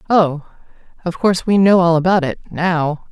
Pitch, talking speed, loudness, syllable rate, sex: 175 Hz, 155 wpm, -15 LUFS, 5.0 syllables/s, female